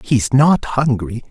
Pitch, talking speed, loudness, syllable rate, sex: 125 Hz, 140 wpm, -15 LUFS, 3.5 syllables/s, male